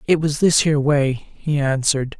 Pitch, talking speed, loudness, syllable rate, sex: 145 Hz, 190 wpm, -18 LUFS, 4.9 syllables/s, male